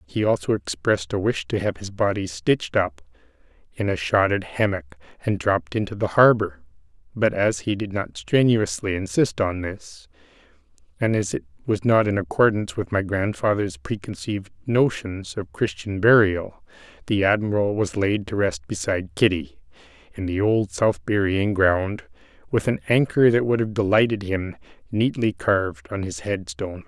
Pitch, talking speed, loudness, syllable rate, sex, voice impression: 105 Hz, 160 wpm, -22 LUFS, 4.9 syllables/s, male, masculine, middle-aged, thick, slightly weak, slightly muffled, slightly halting, mature, friendly, reassuring, wild, lively, kind